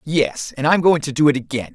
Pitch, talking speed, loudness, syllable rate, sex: 140 Hz, 310 wpm, -18 LUFS, 6.1 syllables/s, male